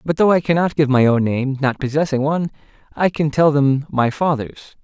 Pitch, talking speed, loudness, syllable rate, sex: 145 Hz, 210 wpm, -17 LUFS, 5.3 syllables/s, male